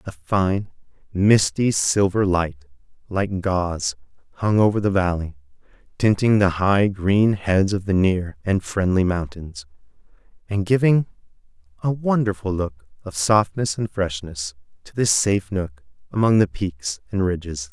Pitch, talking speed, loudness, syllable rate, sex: 95 Hz, 135 wpm, -21 LUFS, 4.2 syllables/s, male